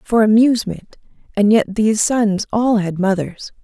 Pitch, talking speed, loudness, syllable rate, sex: 210 Hz, 150 wpm, -16 LUFS, 4.6 syllables/s, female